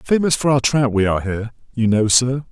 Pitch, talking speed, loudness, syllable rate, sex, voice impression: 125 Hz, 240 wpm, -17 LUFS, 5.8 syllables/s, male, masculine, adult-like, slightly thick, cool, sincere, slightly friendly